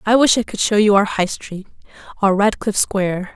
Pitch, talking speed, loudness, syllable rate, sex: 205 Hz, 195 wpm, -17 LUFS, 5.6 syllables/s, female